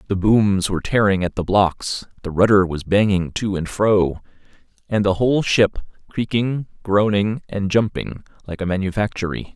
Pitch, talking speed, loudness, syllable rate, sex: 100 Hz, 155 wpm, -19 LUFS, 4.8 syllables/s, male